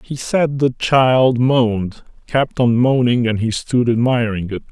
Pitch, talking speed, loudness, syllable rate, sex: 120 Hz, 165 wpm, -16 LUFS, 4.0 syllables/s, male